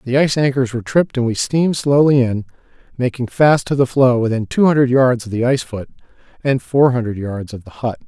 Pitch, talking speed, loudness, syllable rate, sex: 125 Hz, 225 wpm, -16 LUFS, 6.0 syllables/s, male